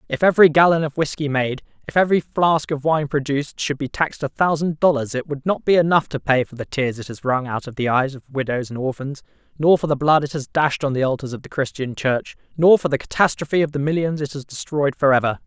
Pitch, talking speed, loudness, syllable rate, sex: 145 Hz, 250 wpm, -20 LUFS, 6.0 syllables/s, male